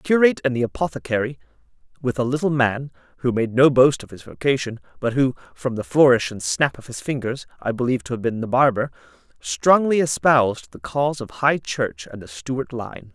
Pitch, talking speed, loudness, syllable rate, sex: 130 Hz, 200 wpm, -21 LUFS, 5.5 syllables/s, male